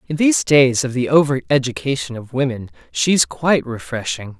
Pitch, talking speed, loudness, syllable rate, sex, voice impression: 130 Hz, 165 wpm, -18 LUFS, 5.3 syllables/s, male, masculine, adult-like, tensed, slightly powerful, bright, fluent, intellectual, calm, friendly, unique, lively, slightly modest